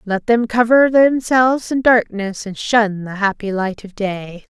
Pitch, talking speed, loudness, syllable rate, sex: 220 Hz, 170 wpm, -16 LUFS, 4.1 syllables/s, female